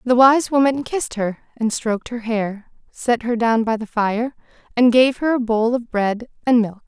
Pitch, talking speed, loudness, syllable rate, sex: 235 Hz, 210 wpm, -19 LUFS, 4.6 syllables/s, female